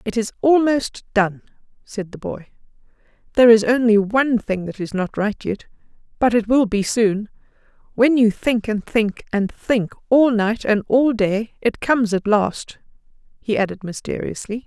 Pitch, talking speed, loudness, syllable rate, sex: 220 Hz, 170 wpm, -19 LUFS, 4.5 syllables/s, female